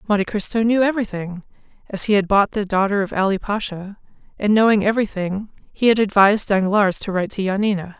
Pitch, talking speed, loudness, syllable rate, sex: 205 Hz, 180 wpm, -19 LUFS, 6.2 syllables/s, female